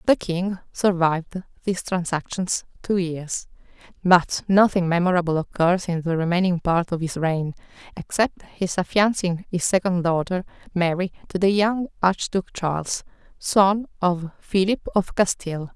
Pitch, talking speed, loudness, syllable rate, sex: 180 Hz, 135 wpm, -22 LUFS, 4.6 syllables/s, female